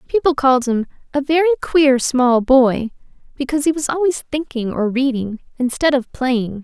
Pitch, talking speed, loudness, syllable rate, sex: 265 Hz, 165 wpm, -17 LUFS, 5.0 syllables/s, female